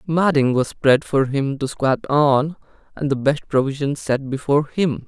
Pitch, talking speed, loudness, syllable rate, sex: 140 Hz, 175 wpm, -19 LUFS, 4.5 syllables/s, male